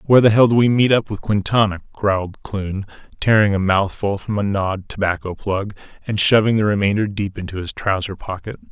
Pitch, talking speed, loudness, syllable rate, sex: 100 Hz, 195 wpm, -19 LUFS, 5.5 syllables/s, male